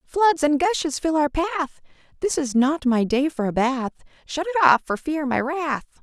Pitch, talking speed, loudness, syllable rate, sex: 295 Hz, 210 wpm, -22 LUFS, 4.7 syllables/s, female